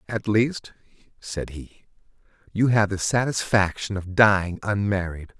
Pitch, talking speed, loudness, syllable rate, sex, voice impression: 100 Hz, 120 wpm, -23 LUFS, 4.2 syllables/s, male, very masculine, old, relaxed, slightly weak, bright, very soft, very muffled, fluent, raspy, cool, very intellectual, slightly refreshing, very sincere, very calm, very mature, very friendly, very reassuring, very unique, elegant, very wild, very sweet, lively, very kind, modest